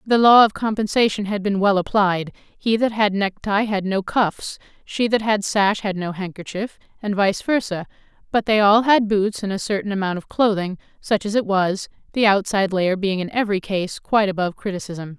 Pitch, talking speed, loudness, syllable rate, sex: 200 Hz, 200 wpm, -20 LUFS, 5.1 syllables/s, female